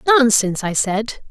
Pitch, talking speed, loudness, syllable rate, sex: 230 Hz, 140 wpm, -17 LUFS, 4.5 syllables/s, female